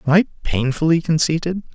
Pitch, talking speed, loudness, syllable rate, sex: 155 Hz, 140 wpm, -19 LUFS, 5.9 syllables/s, male